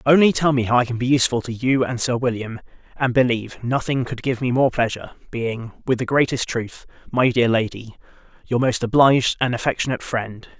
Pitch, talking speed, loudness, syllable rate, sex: 125 Hz, 200 wpm, -20 LUFS, 5.8 syllables/s, male